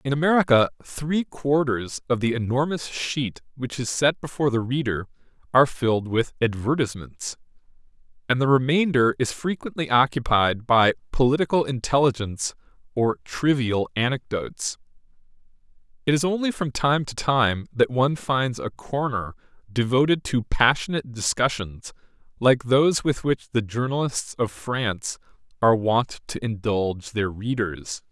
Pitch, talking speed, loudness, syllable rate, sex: 125 Hz, 130 wpm, -23 LUFS, 4.8 syllables/s, male